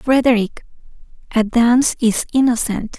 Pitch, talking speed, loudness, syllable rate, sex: 235 Hz, 100 wpm, -16 LUFS, 4.6 syllables/s, female